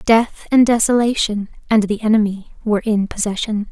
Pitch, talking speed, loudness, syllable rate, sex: 215 Hz, 145 wpm, -17 LUFS, 5.2 syllables/s, female